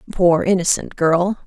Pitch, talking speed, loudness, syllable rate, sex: 180 Hz, 125 wpm, -17 LUFS, 4.2 syllables/s, female